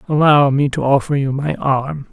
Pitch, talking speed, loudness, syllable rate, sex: 140 Hz, 200 wpm, -16 LUFS, 4.7 syllables/s, female